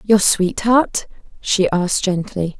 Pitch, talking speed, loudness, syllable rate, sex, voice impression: 200 Hz, 115 wpm, -17 LUFS, 3.7 syllables/s, female, feminine, adult-like, tensed, powerful, soft, raspy, intellectual, calm, reassuring, elegant, slightly strict